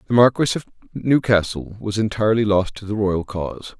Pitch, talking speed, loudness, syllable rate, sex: 105 Hz, 175 wpm, -20 LUFS, 5.5 syllables/s, male